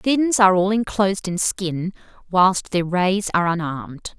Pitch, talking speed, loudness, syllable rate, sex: 190 Hz, 170 wpm, -20 LUFS, 4.8 syllables/s, female